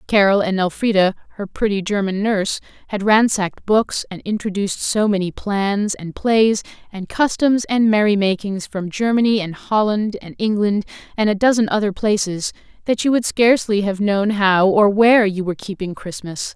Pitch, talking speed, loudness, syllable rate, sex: 205 Hz, 165 wpm, -18 LUFS, 5.0 syllables/s, female